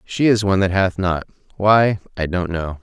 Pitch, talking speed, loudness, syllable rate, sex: 95 Hz, 210 wpm, -18 LUFS, 5.0 syllables/s, male